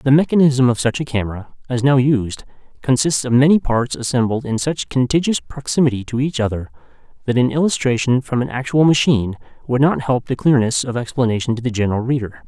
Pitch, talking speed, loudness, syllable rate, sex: 125 Hz, 190 wpm, -17 LUFS, 6.0 syllables/s, male